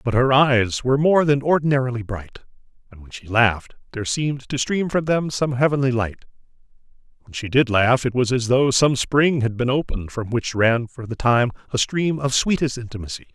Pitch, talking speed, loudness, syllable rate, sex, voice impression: 125 Hz, 200 wpm, -20 LUFS, 5.5 syllables/s, male, masculine, middle-aged, thick, tensed, powerful, clear, fluent, intellectual, slightly calm, mature, friendly, unique, wild, lively, slightly kind